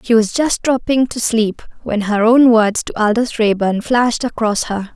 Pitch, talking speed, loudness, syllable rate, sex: 225 Hz, 195 wpm, -15 LUFS, 4.5 syllables/s, female